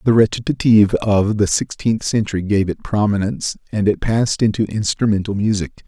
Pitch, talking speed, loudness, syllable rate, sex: 105 Hz, 155 wpm, -18 LUFS, 5.7 syllables/s, male